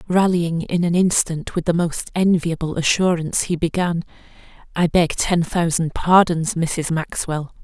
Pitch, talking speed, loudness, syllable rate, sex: 170 Hz, 135 wpm, -19 LUFS, 4.4 syllables/s, female